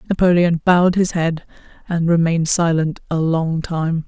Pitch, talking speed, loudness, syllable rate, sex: 170 Hz, 145 wpm, -17 LUFS, 4.8 syllables/s, female